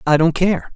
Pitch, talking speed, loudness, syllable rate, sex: 155 Hz, 240 wpm, -17 LUFS, 4.8 syllables/s, male